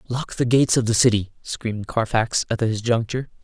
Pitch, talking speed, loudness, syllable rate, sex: 115 Hz, 190 wpm, -21 LUFS, 5.6 syllables/s, male